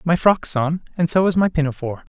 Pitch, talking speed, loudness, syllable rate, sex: 155 Hz, 225 wpm, -19 LUFS, 6.0 syllables/s, male